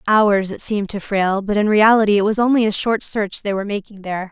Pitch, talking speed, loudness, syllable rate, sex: 205 Hz, 250 wpm, -18 LUFS, 6.3 syllables/s, female